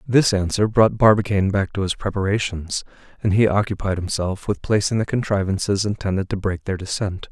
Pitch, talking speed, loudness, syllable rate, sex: 100 Hz, 170 wpm, -21 LUFS, 5.6 syllables/s, male